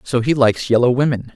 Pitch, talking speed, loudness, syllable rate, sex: 125 Hz, 220 wpm, -16 LUFS, 6.4 syllables/s, male